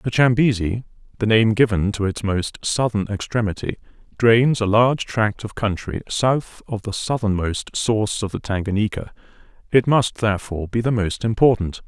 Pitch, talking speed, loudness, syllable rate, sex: 110 Hz, 155 wpm, -20 LUFS, 5.0 syllables/s, male